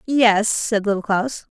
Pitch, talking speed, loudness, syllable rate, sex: 215 Hz, 155 wpm, -19 LUFS, 3.7 syllables/s, female